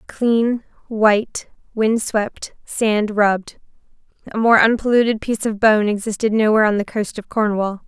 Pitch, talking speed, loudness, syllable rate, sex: 215 Hz, 145 wpm, -18 LUFS, 4.7 syllables/s, female